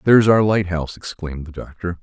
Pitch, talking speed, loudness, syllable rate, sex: 90 Hz, 180 wpm, -19 LUFS, 6.4 syllables/s, male